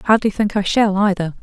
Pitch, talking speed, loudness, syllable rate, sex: 200 Hz, 210 wpm, -17 LUFS, 5.2 syllables/s, female